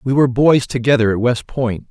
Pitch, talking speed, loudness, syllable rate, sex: 125 Hz, 220 wpm, -16 LUFS, 5.4 syllables/s, male